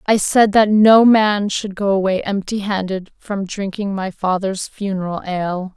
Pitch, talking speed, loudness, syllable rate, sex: 200 Hz, 165 wpm, -17 LUFS, 4.3 syllables/s, female